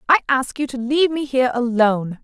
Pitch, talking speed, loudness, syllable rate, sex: 255 Hz, 215 wpm, -19 LUFS, 6.2 syllables/s, female